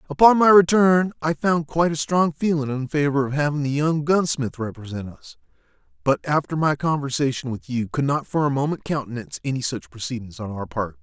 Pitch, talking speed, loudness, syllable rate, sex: 145 Hz, 195 wpm, -21 LUFS, 5.6 syllables/s, male